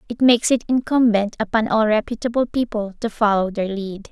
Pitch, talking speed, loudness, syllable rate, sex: 220 Hz, 175 wpm, -19 LUFS, 5.5 syllables/s, female